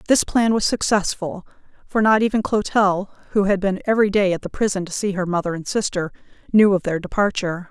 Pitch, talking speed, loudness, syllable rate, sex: 195 Hz, 200 wpm, -20 LUFS, 5.9 syllables/s, female